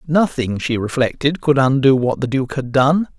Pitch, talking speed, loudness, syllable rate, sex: 135 Hz, 190 wpm, -17 LUFS, 4.7 syllables/s, male